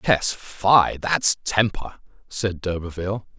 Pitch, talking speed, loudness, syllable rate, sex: 95 Hz, 90 wpm, -21 LUFS, 4.4 syllables/s, male